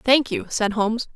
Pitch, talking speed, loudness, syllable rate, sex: 235 Hz, 210 wpm, -22 LUFS, 4.8 syllables/s, female